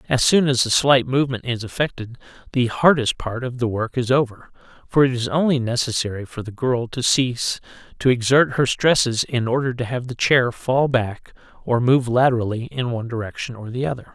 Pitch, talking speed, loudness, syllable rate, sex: 125 Hz, 200 wpm, -20 LUFS, 5.4 syllables/s, male